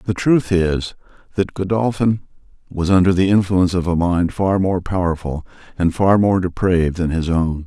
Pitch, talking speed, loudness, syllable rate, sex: 90 Hz, 170 wpm, -18 LUFS, 4.8 syllables/s, male